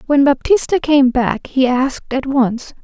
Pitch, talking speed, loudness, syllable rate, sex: 270 Hz, 170 wpm, -15 LUFS, 4.7 syllables/s, female